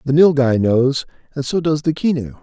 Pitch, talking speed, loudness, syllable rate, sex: 140 Hz, 200 wpm, -17 LUFS, 5.0 syllables/s, male